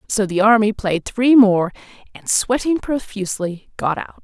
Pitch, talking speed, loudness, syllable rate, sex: 210 Hz, 155 wpm, -18 LUFS, 4.5 syllables/s, female